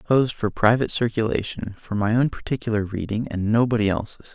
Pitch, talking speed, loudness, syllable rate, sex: 110 Hz, 180 wpm, -23 LUFS, 6.6 syllables/s, male